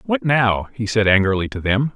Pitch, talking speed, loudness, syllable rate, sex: 115 Hz, 215 wpm, -18 LUFS, 5.1 syllables/s, male